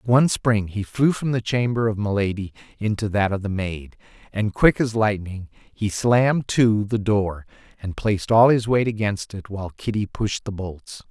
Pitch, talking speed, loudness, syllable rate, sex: 105 Hz, 195 wpm, -22 LUFS, 4.7 syllables/s, male